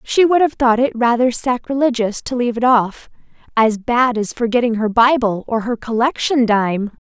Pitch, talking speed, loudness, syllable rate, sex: 240 Hz, 170 wpm, -16 LUFS, 4.8 syllables/s, female